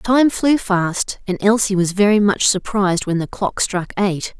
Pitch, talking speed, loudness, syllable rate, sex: 200 Hz, 190 wpm, -17 LUFS, 4.3 syllables/s, female